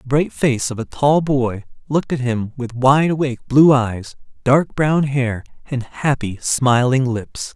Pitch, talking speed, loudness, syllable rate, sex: 130 Hz, 175 wpm, -18 LUFS, 4.1 syllables/s, male